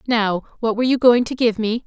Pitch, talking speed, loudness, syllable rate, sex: 230 Hz, 260 wpm, -18 LUFS, 5.8 syllables/s, female